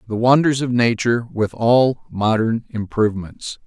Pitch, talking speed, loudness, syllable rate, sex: 115 Hz, 130 wpm, -18 LUFS, 4.7 syllables/s, male